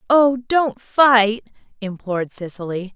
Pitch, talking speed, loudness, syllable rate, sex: 225 Hz, 100 wpm, -18 LUFS, 3.8 syllables/s, female